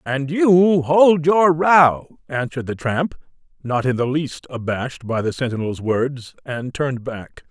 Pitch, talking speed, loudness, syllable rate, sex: 140 Hz, 160 wpm, -19 LUFS, 4.0 syllables/s, male